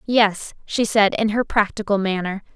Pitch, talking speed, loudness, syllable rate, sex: 210 Hz, 165 wpm, -20 LUFS, 4.5 syllables/s, female